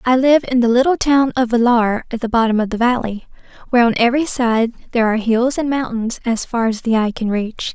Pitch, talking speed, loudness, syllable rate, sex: 235 Hz, 230 wpm, -16 LUFS, 5.8 syllables/s, female